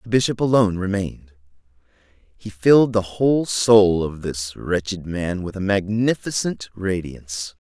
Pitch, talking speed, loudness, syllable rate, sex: 100 Hz, 135 wpm, -20 LUFS, 4.5 syllables/s, male